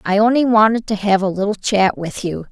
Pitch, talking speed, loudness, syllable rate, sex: 205 Hz, 240 wpm, -16 LUFS, 5.4 syllables/s, female